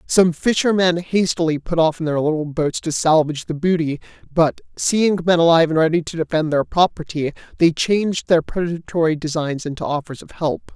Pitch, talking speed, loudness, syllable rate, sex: 165 Hz, 180 wpm, -19 LUFS, 5.4 syllables/s, male